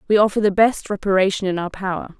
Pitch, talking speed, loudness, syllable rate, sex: 195 Hz, 220 wpm, -19 LUFS, 6.5 syllables/s, female